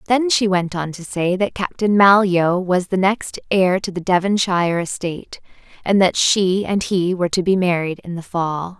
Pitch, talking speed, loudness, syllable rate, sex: 185 Hz, 200 wpm, -18 LUFS, 4.7 syllables/s, female